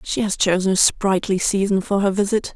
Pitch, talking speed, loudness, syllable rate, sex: 195 Hz, 210 wpm, -19 LUFS, 5.3 syllables/s, female